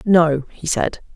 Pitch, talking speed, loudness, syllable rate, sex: 165 Hz, 155 wpm, -19 LUFS, 3.3 syllables/s, female